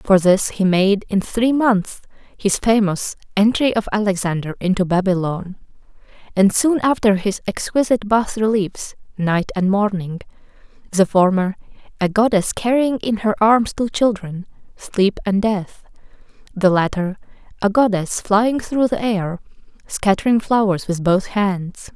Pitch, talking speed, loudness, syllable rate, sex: 205 Hz, 135 wpm, -18 LUFS, 4.3 syllables/s, female